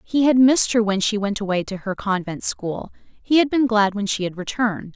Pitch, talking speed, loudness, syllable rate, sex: 215 Hz, 240 wpm, -20 LUFS, 5.3 syllables/s, female